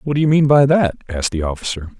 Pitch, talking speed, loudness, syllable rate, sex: 125 Hz, 270 wpm, -16 LUFS, 6.6 syllables/s, male